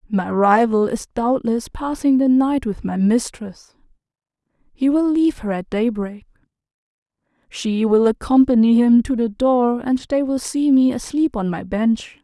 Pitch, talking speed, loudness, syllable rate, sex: 240 Hz, 155 wpm, -18 LUFS, 4.3 syllables/s, female